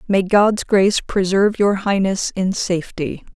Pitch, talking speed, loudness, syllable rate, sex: 195 Hz, 145 wpm, -18 LUFS, 4.6 syllables/s, female